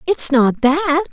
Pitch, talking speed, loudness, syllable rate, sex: 305 Hz, 160 wpm, -15 LUFS, 4.4 syllables/s, female